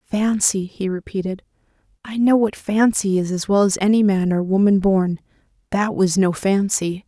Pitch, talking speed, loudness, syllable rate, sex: 200 Hz, 170 wpm, -19 LUFS, 4.6 syllables/s, female